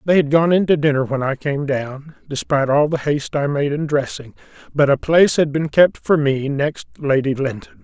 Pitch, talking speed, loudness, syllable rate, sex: 145 Hz, 215 wpm, -18 LUFS, 5.2 syllables/s, male